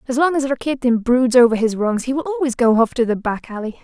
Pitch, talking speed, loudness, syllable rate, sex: 250 Hz, 265 wpm, -17 LUFS, 6.0 syllables/s, female